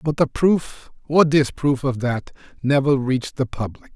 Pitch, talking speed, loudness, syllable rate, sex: 135 Hz, 165 wpm, -20 LUFS, 4.5 syllables/s, male